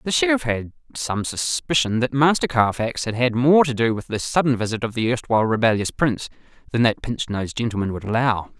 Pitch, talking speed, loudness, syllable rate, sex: 120 Hz, 205 wpm, -21 LUFS, 5.9 syllables/s, male